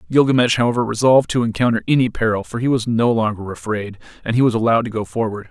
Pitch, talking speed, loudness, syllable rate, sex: 115 Hz, 220 wpm, -18 LUFS, 7.0 syllables/s, male